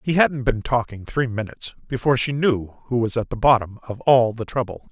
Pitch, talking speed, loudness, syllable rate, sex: 120 Hz, 220 wpm, -21 LUFS, 5.5 syllables/s, male